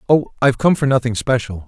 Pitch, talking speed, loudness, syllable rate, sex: 125 Hz, 215 wpm, -17 LUFS, 6.4 syllables/s, male